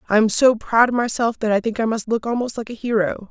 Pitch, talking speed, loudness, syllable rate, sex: 225 Hz, 290 wpm, -19 LUFS, 6.1 syllables/s, female